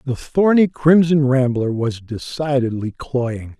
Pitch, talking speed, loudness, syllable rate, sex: 135 Hz, 115 wpm, -18 LUFS, 3.8 syllables/s, male